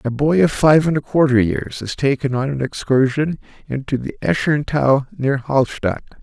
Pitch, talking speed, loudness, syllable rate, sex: 135 Hz, 175 wpm, -18 LUFS, 4.8 syllables/s, male